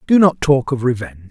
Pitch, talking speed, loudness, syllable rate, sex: 130 Hz, 230 wpm, -16 LUFS, 6.6 syllables/s, male